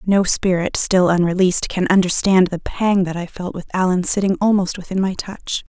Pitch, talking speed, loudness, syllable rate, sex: 185 Hz, 190 wpm, -18 LUFS, 5.2 syllables/s, female